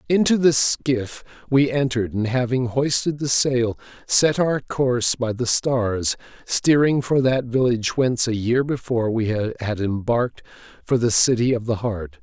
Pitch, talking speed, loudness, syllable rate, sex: 125 Hz, 160 wpm, -20 LUFS, 4.5 syllables/s, male